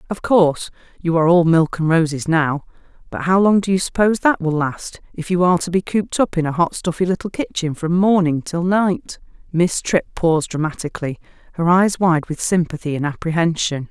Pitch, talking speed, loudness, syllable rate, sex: 170 Hz, 200 wpm, -18 LUFS, 5.5 syllables/s, female